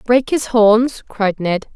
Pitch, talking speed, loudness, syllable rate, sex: 225 Hz, 170 wpm, -16 LUFS, 3.0 syllables/s, female